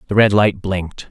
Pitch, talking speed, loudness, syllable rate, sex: 100 Hz, 215 wpm, -16 LUFS, 5.5 syllables/s, male